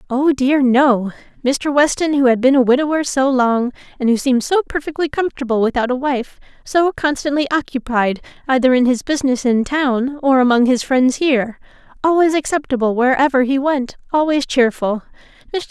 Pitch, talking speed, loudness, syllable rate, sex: 265 Hz, 160 wpm, -16 LUFS, 5.4 syllables/s, female